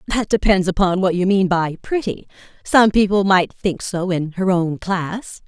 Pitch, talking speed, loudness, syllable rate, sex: 190 Hz, 185 wpm, -18 LUFS, 4.4 syllables/s, female